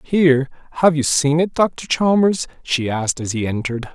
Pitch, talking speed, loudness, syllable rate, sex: 150 Hz, 180 wpm, -18 LUFS, 5.3 syllables/s, male